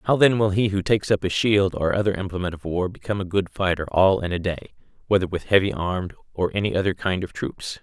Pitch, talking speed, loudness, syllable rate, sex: 95 Hz, 245 wpm, -22 LUFS, 6.2 syllables/s, male